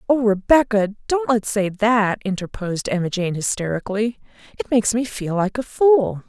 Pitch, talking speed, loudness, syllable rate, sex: 215 Hz, 160 wpm, -20 LUFS, 5.2 syllables/s, female